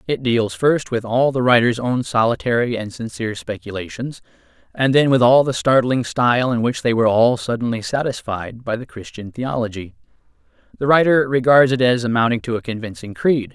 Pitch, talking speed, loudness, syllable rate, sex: 120 Hz, 175 wpm, -18 LUFS, 5.4 syllables/s, male